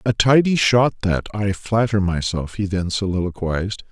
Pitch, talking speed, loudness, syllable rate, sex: 100 Hz, 155 wpm, -19 LUFS, 4.7 syllables/s, male